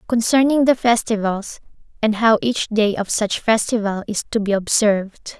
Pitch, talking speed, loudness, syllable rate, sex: 220 Hz, 155 wpm, -18 LUFS, 4.7 syllables/s, female